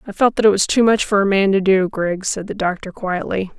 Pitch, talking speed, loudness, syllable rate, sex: 195 Hz, 285 wpm, -17 LUFS, 5.6 syllables/s, female